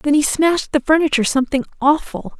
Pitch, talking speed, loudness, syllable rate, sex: 290 Hz, 175 wpm, -17 LUFS, 6.6 syllables/s, female